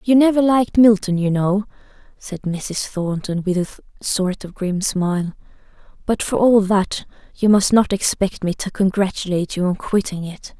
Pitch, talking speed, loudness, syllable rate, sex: 195 Hz, 170 wpm, -19 LUFS, 4.7 syllables/s, female